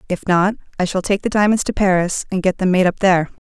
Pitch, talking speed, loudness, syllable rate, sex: 190 Hz, 260 wpm, -17 LUFS, 6.4 syllables/s, female